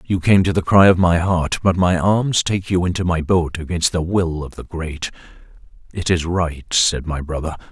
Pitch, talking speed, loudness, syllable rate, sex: 85 Hz, 220 wpm, -18 LUFS, 4.7 syllables/s, male